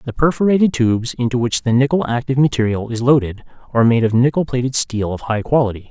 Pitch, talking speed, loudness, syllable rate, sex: 125 Hz, 205 wpm, -17 LUFS, 6.5 syllables/s, male